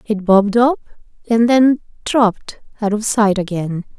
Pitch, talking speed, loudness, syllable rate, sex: 215 Hz, 150 wpm, -16 LUFS, 4.6 syllables/s, female